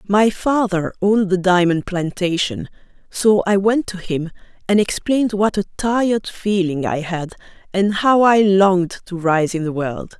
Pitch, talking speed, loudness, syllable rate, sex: 190 Hz, 165 wpm, -18 LUFS, 4.4 syllables/s, female